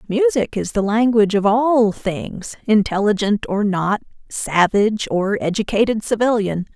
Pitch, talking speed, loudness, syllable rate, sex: 210 Hz, 115 wpm, -18 LUFS, 4.4 syllables/s, female